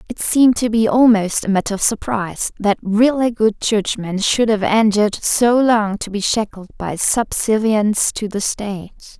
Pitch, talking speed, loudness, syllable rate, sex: 215 Hz, 170 wpm, -17 LUFS, 4.6 syllables/s, female